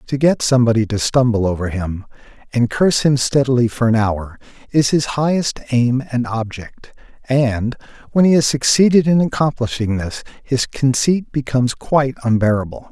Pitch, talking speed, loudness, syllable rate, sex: 125 Hz, 155 wpm, -17 LUFS, 5.1 syllables/s, male